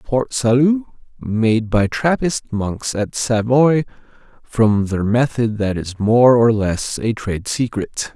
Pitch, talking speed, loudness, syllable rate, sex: 115 Hz, 140 wpm, -17 LUFS, 3.5 syllables/s, male